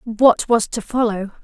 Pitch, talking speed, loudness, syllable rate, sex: 225 Hz, 165 wpm, -18 LUFS, 4.0 syllables/s, female